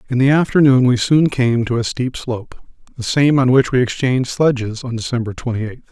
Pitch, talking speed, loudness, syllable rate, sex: 125 Hz, 205 wpm, -16 LUFS, 5.6 syllables/s, male